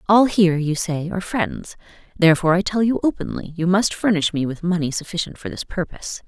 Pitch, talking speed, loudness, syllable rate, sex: 175 Hz, 200 wpm, -20 LUFS, 6.1 syllables/s, female